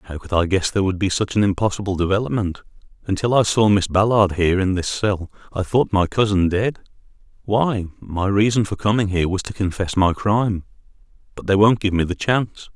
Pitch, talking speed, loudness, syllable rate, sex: 100 Hz, 200 wpm, -20 LUFS, 5.7 syllables/s, male